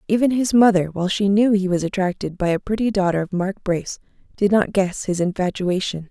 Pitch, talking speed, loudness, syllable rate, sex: 195 Hz, 205 wpm, -20 LUFS, 5.8 syllables/s, female